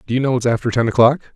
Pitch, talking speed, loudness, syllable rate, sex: 125 Hz, 310 wpm, -16 LUFS, 8.5 syllables/s, male